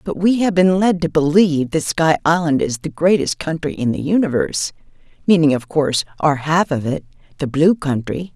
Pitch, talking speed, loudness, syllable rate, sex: 160 Hz, 185 wpm, -17 LUFS, 5.3 syllables/s, female